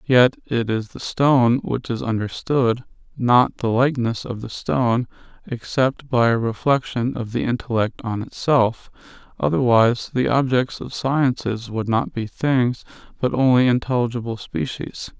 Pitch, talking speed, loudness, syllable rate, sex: 120 Hz, 140 wpm, -21 LUFS, 4.4 syllables/s, male